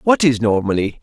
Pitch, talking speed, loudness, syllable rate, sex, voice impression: 125 Hz, 175 wpm, -16 LUFS, 5.4 syllables/s, male, very masculine, very feminine, slightly young, slightly thick, slightly relaxed, slightly powerful, very bright, very hard, clear, fluent, slightly cool, intellectual, refreshing, sincere, calm, mature, friendly, reassuring, very unique, slightly elegant, wild, slightly sweet, lively, kind